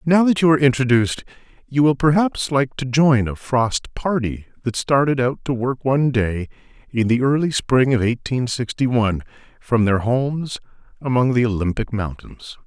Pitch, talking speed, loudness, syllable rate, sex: 125 Hz, 170 wpm, -19 LUFS, 4.9 syllables/s, male